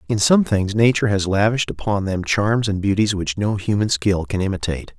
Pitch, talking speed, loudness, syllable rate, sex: 100 Hz, 205 wpm, -19 LUFS, 5.6 syllables/s, male